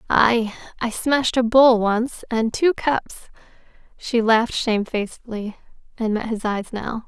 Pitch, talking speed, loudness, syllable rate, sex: 230 Hz, 135 wpm, -20 LUFS, 4.4 syllables/s, female